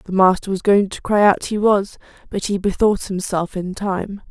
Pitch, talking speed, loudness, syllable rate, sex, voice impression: 195 Hz, 210 wpm, -18 LUFS, 4.7 syllables/s, female, feminine, adult-like, relaxed, powerful, soft, muffled, intellectual, slightly friendly, slightly reassuring, elegant, lively, slightly sharp